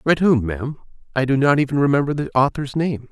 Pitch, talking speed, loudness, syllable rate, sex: 140 Hz, 190 wpm, -19 LUFS, 6.1 syllables/s, male